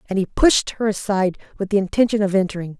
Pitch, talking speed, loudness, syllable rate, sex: 200 Hz, 215 wpm, -19 LUFS, 6.5 syllables/s, female